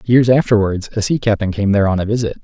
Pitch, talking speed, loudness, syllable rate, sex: 105 Hz, 245 wpm, -16 LUFS, 6.7 syllables/s, male